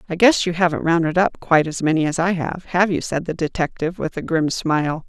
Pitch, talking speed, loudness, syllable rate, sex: 165 Hz, 250 wpm, -20 LUFS, 6.1 syllables/s, female